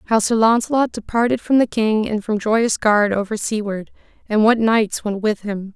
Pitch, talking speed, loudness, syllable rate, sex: 215 Hz, 200 wpm, -18 LUFS, 4.6 syllables/s, female